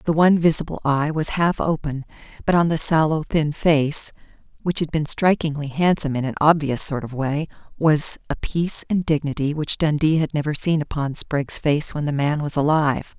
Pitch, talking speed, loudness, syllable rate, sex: 150 Hz, 190 wpm, -20 LUFS, 5.2 syllables/s, female